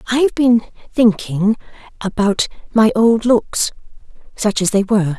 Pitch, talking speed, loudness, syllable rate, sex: 215 Hz, 125 wpm, -16 LUFS, 4.6 syllables/s, female